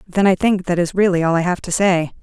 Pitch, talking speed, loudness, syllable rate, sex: 180 Hz, 295 wpm, -17 LUFS, 6.0 syllables/s, female